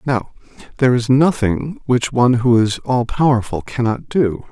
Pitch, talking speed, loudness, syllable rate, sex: 125 Hz, 160 wpm, -17 LUFS, 4.6 syllables/s, male